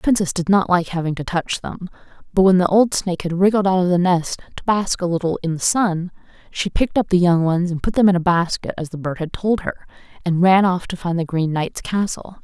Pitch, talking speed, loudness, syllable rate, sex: 180 Hz, 260 wpm, -19 LUFS, 5.6 syllables/s, female